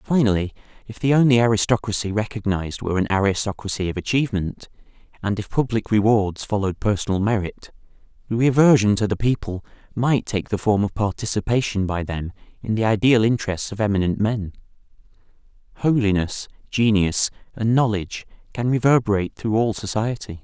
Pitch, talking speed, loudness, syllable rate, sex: 105 Hz, 140 wpm, -21 LUFS, 5.8 syllables/s, male